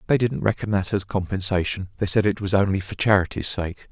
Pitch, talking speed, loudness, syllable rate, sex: 100 Hz, 215 wpm, -23 LUFS, 5.8 syllables/s, male